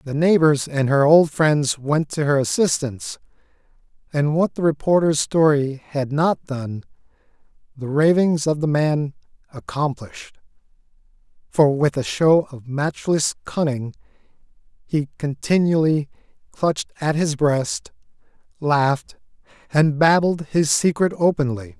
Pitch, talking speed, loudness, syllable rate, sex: 150 Hz, 120 wpm, -20 LUFS, 4.2 syllables/s, male